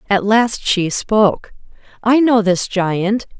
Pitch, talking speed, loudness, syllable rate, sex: 210 Hz, 140 wpm, -15 LUFS, 3.5 syllables/s, female